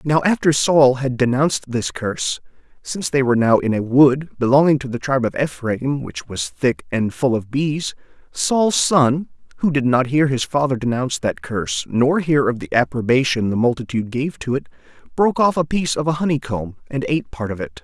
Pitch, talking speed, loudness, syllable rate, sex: 130 Hz, 205 wpm, -19 LUFS, 5.4 syllables/s, male